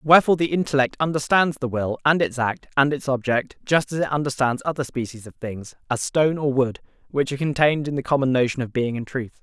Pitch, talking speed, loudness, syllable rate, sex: 135 Hz, 225 wpm, -22 LUFS, 6.1 syllables/s, male